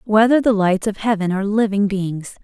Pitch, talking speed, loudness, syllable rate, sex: 205 Hz, 195 wpm, -18 LUFS, 5.3 syllables/s, female